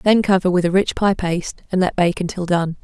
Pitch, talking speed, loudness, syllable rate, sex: 180 Hz, 255 wpm, -18 LUFS, 5.7 syllables/s, female